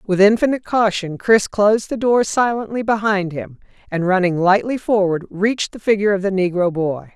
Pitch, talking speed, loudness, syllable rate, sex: 200 Hz, 175 wpm, -18 LUFS, 5.4 syllables/s, female